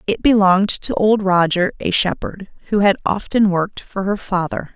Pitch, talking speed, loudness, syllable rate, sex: 195 Hz, 175 wpm, -17 LUFS, 4.9 syllables/s, female